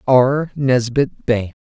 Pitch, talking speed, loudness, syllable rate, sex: 130 Hz, 110 wpm, -17 LUFS, 2.9 syllables/s, male